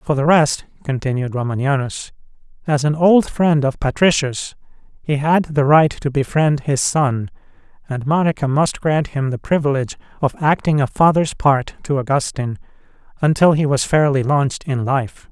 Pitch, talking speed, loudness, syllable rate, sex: 145 Hz, 155 wpm, -17 LUFS, 4.8 syllables/s, male